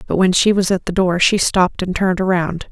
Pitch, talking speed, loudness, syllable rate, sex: 185 Hz, 265 wpm, -16 LUFS, 5.8 syllables/s, female